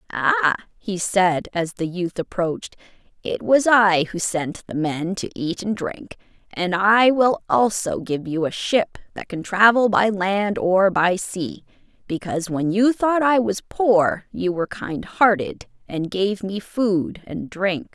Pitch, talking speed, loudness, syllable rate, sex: 195 Hz, 170 wpm, -21 LUFS, 3.8 syllables/s, female